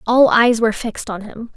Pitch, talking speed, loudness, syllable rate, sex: 225 Hz, 230 wpm, -15 LUFS, 5.7 syllables/s, female